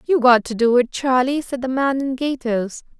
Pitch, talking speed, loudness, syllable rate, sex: 255 Hz, 220 wpm, -19 LUFS, 4.8 syllables/s, female